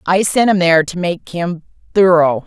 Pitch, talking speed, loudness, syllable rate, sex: 175 Hz, 195 wpm, -14 LUFS, 4.9 syllables/s, female